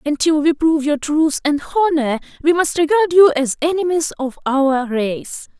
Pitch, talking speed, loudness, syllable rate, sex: 300 Hz, 170 wpm, -17 LUFS, 4.6 syllables/s, female